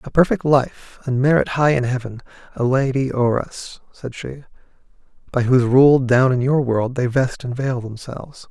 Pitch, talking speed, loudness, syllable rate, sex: 130 Hz, 185 wpm, -18 LUFS, 4.8 syllables/s, male